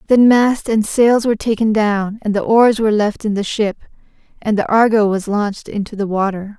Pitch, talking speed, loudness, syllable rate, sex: 215 Hz, 210 wpm, -16 LUFS, 5.2 syllables/s, female